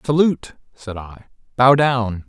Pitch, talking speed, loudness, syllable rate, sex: 120 Hz, 130 wpm, -16 LUFS, 4.1 syllables/s, male